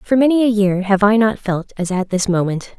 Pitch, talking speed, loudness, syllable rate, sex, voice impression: 205 Hz, 260 wpm, -16 LUFS, 5.2 syllables/s, female, very feminine, very middle-aged, very thin, slightly tensed, slightly weak, bright, soft, very clear, very fluent, slightly raspy, cute, very intellectual, very refreshing, sincere, calm, very friendly, very reassuring, very unique, very elegant, very sweet, lively, very kind, slightly intense, slightly sharp, slightly modest, very light